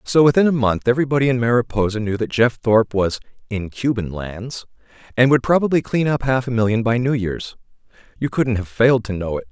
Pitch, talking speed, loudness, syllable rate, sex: 120 Hz, 210 wpm, -19 LUFS, 5.9 syllables/s, male